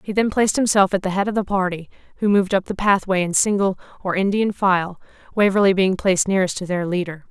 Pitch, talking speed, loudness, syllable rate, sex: 190 Hz, 220 wpm, -19 LUFS, 6.4 syllables/s, female